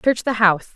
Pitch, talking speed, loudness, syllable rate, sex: 215 Hz, 240 wpm, -18 LUFS, 6.3 syllables/s, female